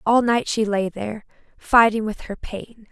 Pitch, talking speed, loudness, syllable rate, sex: 220 Hz, 185 wpm, -20 LUFS, 4.4 syllables/s, female